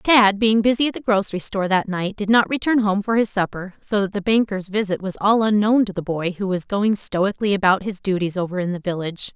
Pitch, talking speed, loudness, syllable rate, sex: 200 Hz, 245 wpm, -20 LUFS, 5.8 syllables/s, female